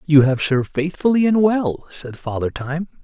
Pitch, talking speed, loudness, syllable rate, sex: 155 Hz, 180 wpm, -19 LUFS, 4.7 syllables/s, male